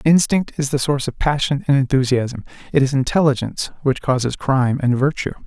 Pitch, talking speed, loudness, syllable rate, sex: 135 Hz, 175 wpm, -19 LUFS, 5.9 syllables/s, male